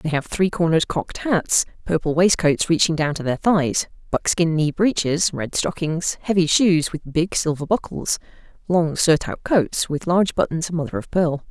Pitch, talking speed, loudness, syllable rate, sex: 165 Hz, 175 wpm, -20 LUFS, 4.8 syllables/s, female